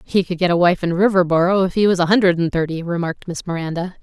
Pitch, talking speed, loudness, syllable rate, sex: 175 Hz, 255 wpm, -18 LUFS, 6.7 syllables/s, female